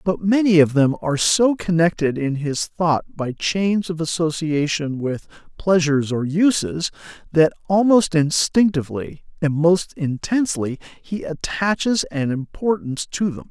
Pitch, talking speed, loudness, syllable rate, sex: 165 Hz, 135 wpm, -20 LUFS, 4.4 syllables/s, male